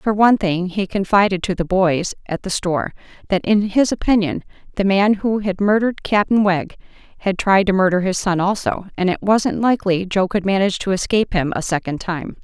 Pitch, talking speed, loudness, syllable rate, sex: 195 Hz, 205 wpm, -18 LUFS, 5.4 syllables/s, female